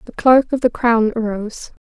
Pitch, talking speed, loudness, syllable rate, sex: 230 Hz, 195 wpm, -16 LUFS, 5.1 syllables/s, female